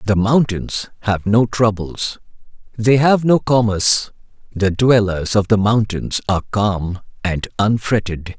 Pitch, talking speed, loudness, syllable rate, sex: 105 Hz, 130 wpm, -17 LUFS, 4.0 syllables/s, male